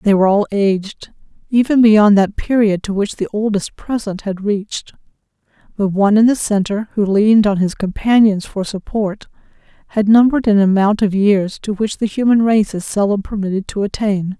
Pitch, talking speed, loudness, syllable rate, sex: 205 Hz, 180 wpm, -15 LUFS, 5.2 syllables/s, female